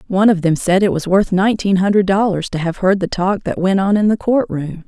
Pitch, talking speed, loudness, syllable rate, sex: 190 Hz, 270 wpm, -16 LUFS, 5.8 syllables/s, female